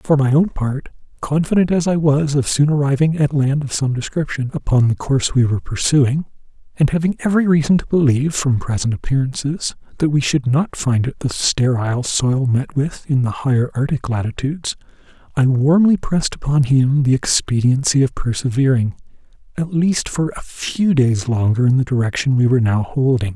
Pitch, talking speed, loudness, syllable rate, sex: 135 Hz, 180 wpm, -17 LUFS, 5.3 syllables/s, male